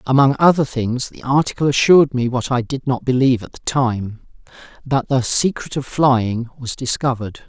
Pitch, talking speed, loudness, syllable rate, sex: 130 Hz, 175 wpm, -18 LUFS, 5.2 syllables/s, male